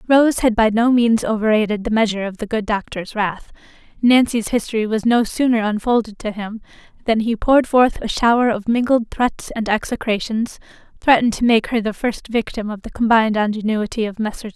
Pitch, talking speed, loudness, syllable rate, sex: 225 Hz, 185 wpm, -18 LUFS, 5.4 syllables/s, female